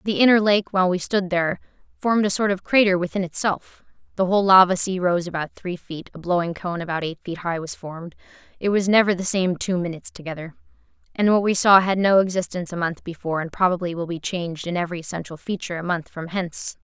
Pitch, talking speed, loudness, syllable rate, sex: 180 Hz, 220 wpm, -22 LUFS, 6.4 syllables/s, female